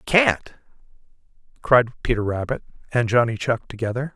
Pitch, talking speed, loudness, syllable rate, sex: 120 Hz, 115 wpm, -22 LUFS, 4.7 syllables/s, male